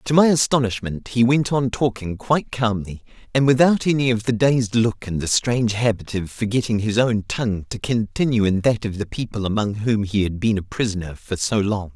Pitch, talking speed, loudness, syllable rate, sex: 115 Hz, 210 wpm, -20 LUFS, 5.3 syllables/s, male